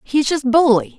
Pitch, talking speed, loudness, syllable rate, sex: 280 Hz, 185 wpm, -15 LUFS, 4.5 syllables/s, female